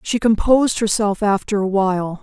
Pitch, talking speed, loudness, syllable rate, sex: 205 Hz, 160 wpm, -17 LUFS, 5.2 syllables/s, female